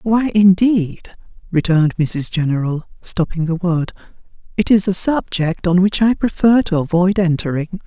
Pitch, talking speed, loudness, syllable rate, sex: 180 Hz, 145 wpm, -16 LUFS, 4.5 syllables/s, female